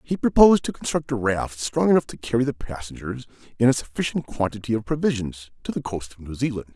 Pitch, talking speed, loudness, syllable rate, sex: 120 Hz, 215 wpm, -23 LUFS, 6.1 syllables/s, male